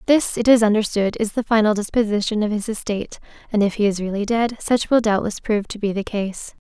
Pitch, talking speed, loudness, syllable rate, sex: 215 Hz, 225 wpm, -20 LUFS, 6.0 syllables/s, female